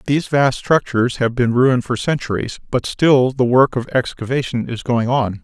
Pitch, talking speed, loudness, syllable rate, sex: 125 Hz, 190 wpm, -17 LUFS, 5.1 syllables/s, male